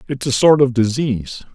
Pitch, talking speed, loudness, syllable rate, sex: 130 Hz, 195 wpm, -16 LUFS, 5.3 syllables/s, male